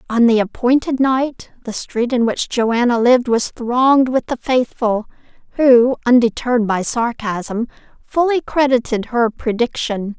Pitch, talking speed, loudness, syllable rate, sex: 240 Hz, 135 wpm, -16 LUFS, 4.3 syllables/s, female